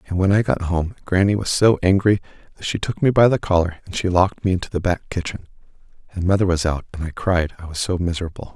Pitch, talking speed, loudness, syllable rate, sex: 90 Hz, 245 wpm, -20 LUFS, 6.4 syllables/s, male